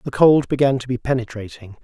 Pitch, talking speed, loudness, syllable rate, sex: 125 Hz, 195 wpm, -18 LUFS, 6.0 syllables/s, male